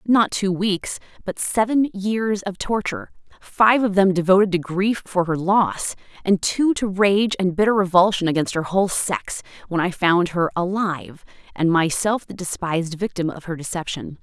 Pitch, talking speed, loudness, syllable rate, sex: 185 Hz, 175 wpm, -20 LUFS, 4.7 syllables/s, female